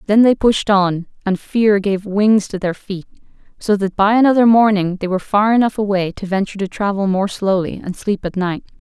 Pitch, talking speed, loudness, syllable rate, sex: 200 Hz, 210 wpm, -16 LUFS, 5.3 syllables/s, female